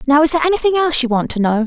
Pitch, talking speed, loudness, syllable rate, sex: 285 Hz, 325 wpm, -15 LUFS, 8.8 syllables/s, female